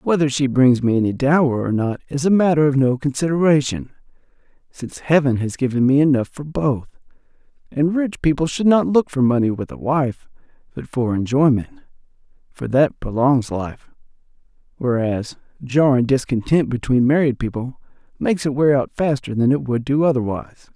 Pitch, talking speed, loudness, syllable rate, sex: 135 Hz, 160 wpm, -18 LUFS, 5.2 syllables/s, male